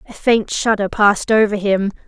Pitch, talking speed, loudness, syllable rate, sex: 210 Hz, 175 wpm, -16 LUFS, 5.2 syllables/s, female